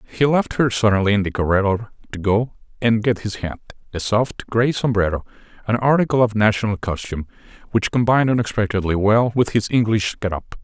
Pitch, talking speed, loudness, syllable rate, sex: 110 Hz, 175 wpm, -19 LUFS, 5.7 syllables/s, male